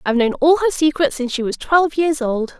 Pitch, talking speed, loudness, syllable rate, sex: 285 Hz, 255 wpm, -17 LUFS, 6.1 syllables/s, female